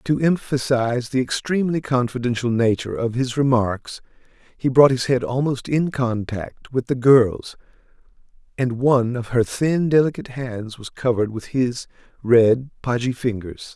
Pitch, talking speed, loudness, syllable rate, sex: 125 Hz, 145 wpm, -20 LUFS, 4.7 syllables/s, male